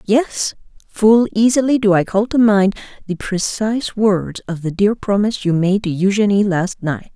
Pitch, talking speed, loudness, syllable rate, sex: 205 Hz, 175 wpm, -16 LUFS, 4.6 syllables/s, female